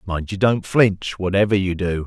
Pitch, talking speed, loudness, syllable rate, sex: 95 Hz, 205 wpm, -19 LUFS, 4.6 syllables/s, male